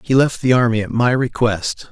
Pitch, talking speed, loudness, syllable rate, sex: 120 Hz, 220 wpm, -17 LUFS, 5.0 syllables/s, male